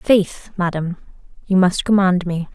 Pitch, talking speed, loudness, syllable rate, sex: 185 Hz, 140 wpm, -18 LUFS, 4.6 syllables/s, female